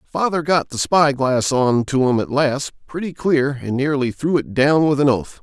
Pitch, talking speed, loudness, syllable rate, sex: 140 Hz, 210 wpm, -18 LUFS, 4.4 syllables/s, male